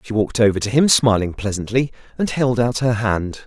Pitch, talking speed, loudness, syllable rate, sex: 115 Hz, 210 wpm, -18 LUFS, 5.5 syllables/s, male